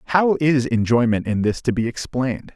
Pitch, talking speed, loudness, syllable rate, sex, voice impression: 125 Hz, 190 wpm, -20 LUFS, 5.4 syllables/s, male, masculine, middle-aged, thick, tensed, powerful, slightly bright, muffled, slightly raspy, cool, intellectual, calm, wild, strict